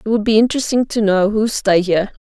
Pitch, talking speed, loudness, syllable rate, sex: 210 Hz, 245 wpm, -16 LUFS, 6.3 syllables/s, female